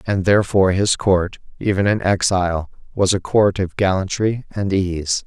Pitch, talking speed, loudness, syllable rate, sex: 95 Hz, 160 wpm, -18 LUFS, 4.7 syllables/s, male